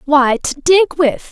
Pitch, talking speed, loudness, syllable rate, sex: 300 Hz, 180 wpm, -14 LUFS, 3.5 syllables/s, female